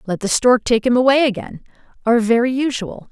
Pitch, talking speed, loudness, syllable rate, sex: 235 Hz, 195 wpm, -16 LUFS, 5.8 syllables/s, female